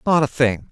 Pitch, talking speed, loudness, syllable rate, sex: 130 Hz, 255 wpm, -19 LUFS, 5.1 syllables/s, male